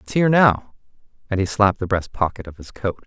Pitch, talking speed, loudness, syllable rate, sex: 105 Hz, 235 wpm, -20 LUFS, 6.2 syllables/s, male